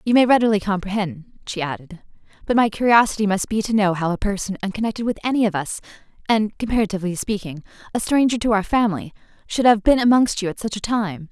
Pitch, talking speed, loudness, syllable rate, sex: 205 Hz, 200 wpm, -20 LUFS, 6.1 syllables/s, female